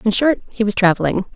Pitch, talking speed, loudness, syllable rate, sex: 210 Hz, 220 wpm, -17 LUFS, 6.4 syllables/s, female